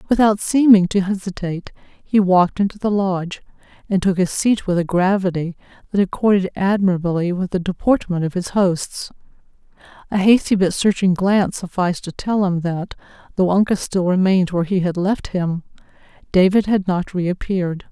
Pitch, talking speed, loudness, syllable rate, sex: 190 Hz, 160 wpm, -18 LUFS, 5.3 syllables/s, female